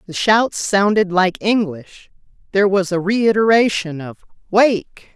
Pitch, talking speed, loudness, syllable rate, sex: 195 Hz, 130 wpm, -16 LUFS, 4.1 syllables/s, female